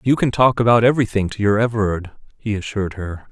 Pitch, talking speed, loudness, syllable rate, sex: 110 Hz, 200 wpm, -18 LUFS, 6.4 syllables/s, male